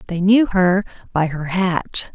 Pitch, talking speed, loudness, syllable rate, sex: 185 Hz, 170 wpm, -18 LUFS, 3.6 syllables/s, female